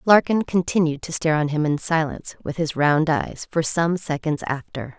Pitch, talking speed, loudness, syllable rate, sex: 160 Hz, 190 wpm, -22 LUFS, 5.0 syllables/s, female